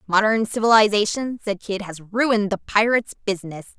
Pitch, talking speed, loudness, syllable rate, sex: 210 Hz, 145 wpm, -20 LUFS, 5.8 syllables/s, female